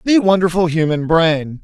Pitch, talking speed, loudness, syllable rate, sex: 170 Hz, 145 wpm, -15 LUFS, 4.6 syllables/s, male